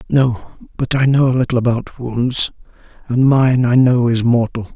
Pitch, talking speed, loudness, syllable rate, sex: 125 Hz, 175 wpm, -15 LUFS, 4.5 syllables/s, male